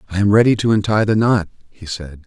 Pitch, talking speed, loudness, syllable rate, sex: 100 Hz, 240 wpm, -16 LUFS, 6.2 syllables/s, male